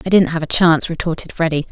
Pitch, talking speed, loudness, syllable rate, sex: 165 Hz, 245 wpm, -17 LUFS, 7.1 syllables/s, female